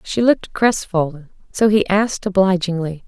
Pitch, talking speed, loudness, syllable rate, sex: 190 Hz, 135 wpm, -18 LUFS, 5.1 syllables/s, female